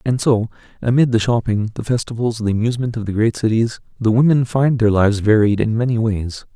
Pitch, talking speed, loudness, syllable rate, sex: 115 Hz, 200 wpm, -17 LUFS, 5.8 syllables/s, male